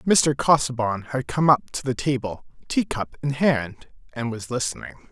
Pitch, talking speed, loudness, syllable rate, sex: 135 Hz, 165 wpm, -23 LUFS, 4.7 syllables/s, male